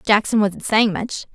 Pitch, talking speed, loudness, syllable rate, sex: 215 Hz, 180 wpm, -19 LUFS, 4.5 syllables/s, female